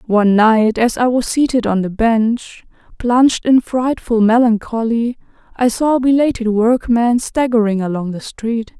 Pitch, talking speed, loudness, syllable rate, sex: 230 Hz, 150 wpm, -15 LUFS, 4.4 syllables/s, female